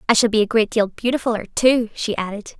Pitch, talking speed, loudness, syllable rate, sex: 225 Hz, 230 wpm, -19 LUFS, 5.9 syllables/s, female